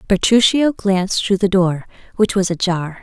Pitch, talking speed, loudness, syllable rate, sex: 195 Hz, 160 wpm, -16 LUFS, 4.7 syllables/s, female